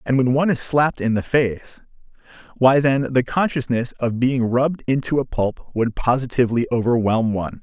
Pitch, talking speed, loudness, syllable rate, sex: 125 Hz, 165 wpm, -20 LUFS, 5.3 syllables/s, male